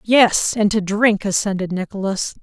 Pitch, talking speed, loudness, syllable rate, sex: 205 Hz, 150 wpm, -18 LUFS, 4.5 syllables/s, female